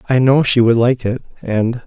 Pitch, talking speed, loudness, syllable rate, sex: 120 Hz, 225 wpm, -15 LUFS, 4.9 syllables/s, male